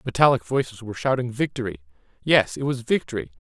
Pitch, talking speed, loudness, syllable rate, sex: 120 Hz, 155 wpm, -23 LUFS, 6.4 syllables/s, male